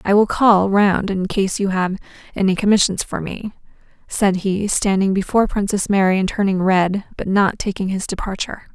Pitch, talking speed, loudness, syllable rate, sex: 195 Hz, 180 wpm, -18 LUFS, 5.1 syllables/s, female